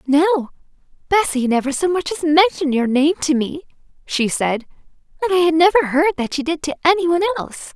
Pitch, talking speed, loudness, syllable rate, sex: 315 Hz, 180 wpm, -18 LUFS, 5.5 syllables/s, female